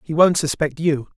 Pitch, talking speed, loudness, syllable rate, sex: 155 Hz, 205 wpm, -19 LUFS, 5.0 syllables/s, male